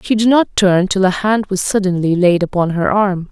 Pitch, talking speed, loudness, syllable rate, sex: 190 Hz, 235 wpm, -14 LUFS, 5.0 syllables/s, female